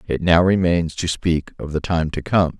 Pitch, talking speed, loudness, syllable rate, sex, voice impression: 85 Hz, 230 wpm, -19 LUFS, 4.6 syllables/s, male, very masculine, very adult-like, middle-aged, very thick, slightly tensed, weak, slightly dark, soft, slightly muffled, fluent, very cool, intellectual, slightly refreshing, very sincere, very calm, very mature, very friendly, reassuring, slightly unique, slightly elegant, slightly wild, kind, slightly modest